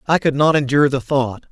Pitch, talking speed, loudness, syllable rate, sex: 140 Hz, 235 wpm, -17 LUFS, 6.2 syllables/s, male